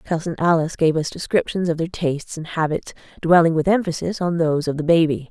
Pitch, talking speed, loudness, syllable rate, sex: 165 Hz, 205 wpm, -20 LUFS, 6.0 syllables/s, female